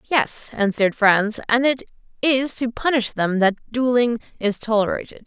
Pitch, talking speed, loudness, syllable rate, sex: 230 Hz, 150 wpm, -20 LUFS, 4.6 syllables/s, female